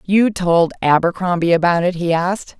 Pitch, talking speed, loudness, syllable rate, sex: 175 Hz, 160 wpm, -16 LUFS, 5.0 syllables/s, female